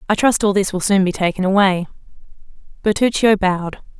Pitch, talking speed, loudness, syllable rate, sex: 195 Hz, 165 wpm, -17 LUFS, 5.9 syllables/s, female